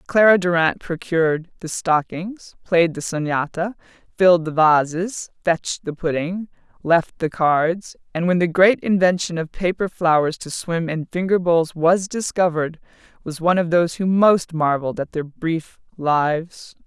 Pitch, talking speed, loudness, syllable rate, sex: 170 Hz, 155 wpm, -20 LUFS, 4.5 syllables/s, female